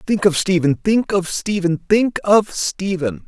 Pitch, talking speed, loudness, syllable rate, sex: 180 Hz, 165 wpm, -18 LUFS, 3.8 syllables/s, male